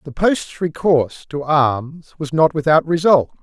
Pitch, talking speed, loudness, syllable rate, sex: 150 Hz, 160 wpm, -17 LUFS, 4.2 syllables/s, male